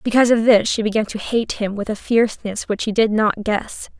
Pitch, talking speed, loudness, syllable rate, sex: 220 Hz, 240 wpm, -19 LUFS, 5.5 syllables/s, female